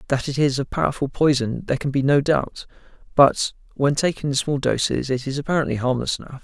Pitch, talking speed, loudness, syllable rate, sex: 140 Hz, 205 wpm, -21 LUFS, 6.0 syllables/s, male